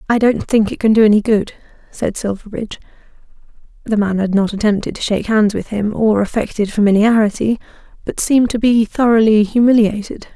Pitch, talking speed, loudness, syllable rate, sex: 215 Hz, 170 wpm, -15 LUFS, 5.8 syllables/s, female